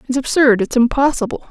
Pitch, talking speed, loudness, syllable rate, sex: 255 Hz, 120 wpm, -15 LUFS, 6.0 syllables/s, female